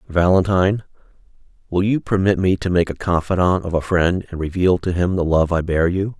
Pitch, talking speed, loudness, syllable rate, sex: 90 Hz, 205 wpm, -19 LUFS, 5.4 syllables/s, male